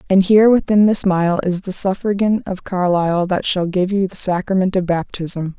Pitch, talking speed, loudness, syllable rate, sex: 190 Hz, 195 wpm, -17 LUFS, 5.1 syllables/s, female